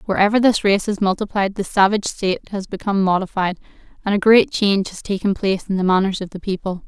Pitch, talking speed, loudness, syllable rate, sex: 200 Hz, 210 wpm, -19 LUFS, 6.6 syllables/s, female